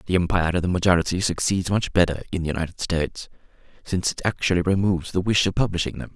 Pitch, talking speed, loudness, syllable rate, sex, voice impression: 90 Hz, 205 wpm, -23 LUFS, 7.2 syllables/s, male, very masculine, adult-like, slightly muffled, cool, calm, slightly mature, sweet